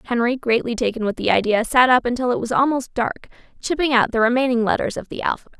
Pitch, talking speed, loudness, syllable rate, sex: 240 Hz, 225 wpm, -19 LUFS, 6.4 syllables/s, female